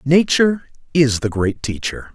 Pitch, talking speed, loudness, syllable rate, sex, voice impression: 135 Hz, 140 wpm, -18 LUFS, 4.4 syllables/s, male, masculine, very adult-like, cool, slightly intellectual, slightly refreshing